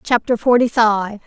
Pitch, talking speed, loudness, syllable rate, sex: 225 Hz, 145 wpm, -16 LUFS, 4.4 syllables/s, female